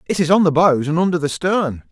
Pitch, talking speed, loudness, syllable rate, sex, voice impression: 160 Hz, 280 wpm, -17 LUFS, 5.8 syllables/s, male, masculine, adult-like, tensed, powerful, bright, clear, fluent, slightly friendly, wild, lively, slightly strict, intense, slightly sharp